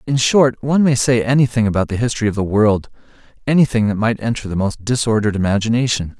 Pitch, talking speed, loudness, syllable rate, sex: 115 Hz, 185 wpm, -16 LUFS, 6.6 syllables/s, male